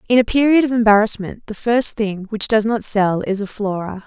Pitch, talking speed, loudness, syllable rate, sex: 215 Hz, 220 wpm, -17 LUFS, 5.3 syllables/s, female